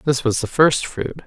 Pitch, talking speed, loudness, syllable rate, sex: 135 Hz, 240 wpm, -19 LUFS, 4.5 syllables/s, male